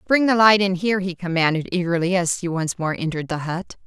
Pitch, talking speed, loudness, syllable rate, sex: 180 Hz, 235 wpm, -20 LUFS, 6.1 syllables/s, female